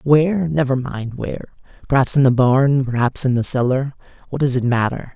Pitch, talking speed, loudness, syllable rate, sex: 135 Hz, 185 wpm, -18 LUFS, 5.2 syllables/s, male